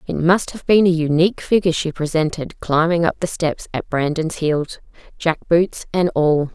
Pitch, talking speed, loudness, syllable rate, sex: 165 Hz, 185 wpm, -18 LUFS, 4.8 syllables/s, female